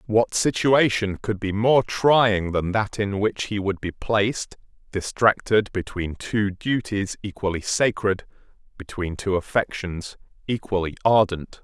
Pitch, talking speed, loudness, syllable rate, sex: 105 Hz, 130 wpm, -23 LUFS, 4.0 syllables/s, male